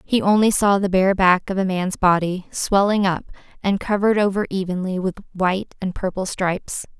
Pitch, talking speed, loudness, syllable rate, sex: 190 Hz, 180 wpm, -20 LUFS, 5.1 syllables/s, female